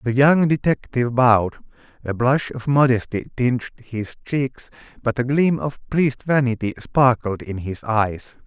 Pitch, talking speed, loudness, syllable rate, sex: 125 Hz, 150 wpm, -20 LUFS, 4.6 syllables/s, male